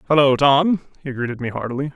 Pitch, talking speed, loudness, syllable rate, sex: 140 Hz, 185 wpm, -19 LUFS, 6.5 syllables/s, male